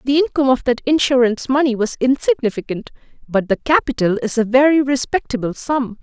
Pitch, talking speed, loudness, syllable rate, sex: 250 Hz, 160 wpm, -17 LUFS, 5.9 syllables/s, female